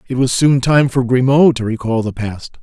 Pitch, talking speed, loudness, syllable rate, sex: 125 Hz, 230 wpm, -14 LUFS, 4.9 syllables/s, male